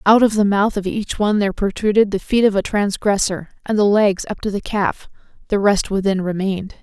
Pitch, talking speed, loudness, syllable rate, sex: 200 Hz, 220 wpm, -18 LUFS, 5.6 syllables/s, female